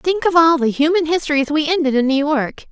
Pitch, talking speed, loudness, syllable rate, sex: 300 Hz, 245 wpm, -16 LUFS, 5.8 syllables/s, female